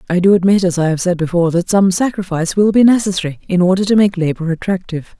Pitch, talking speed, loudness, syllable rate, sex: 185 Hz, 230 wpm, -14 LUFS, 6.9 syllables/s, female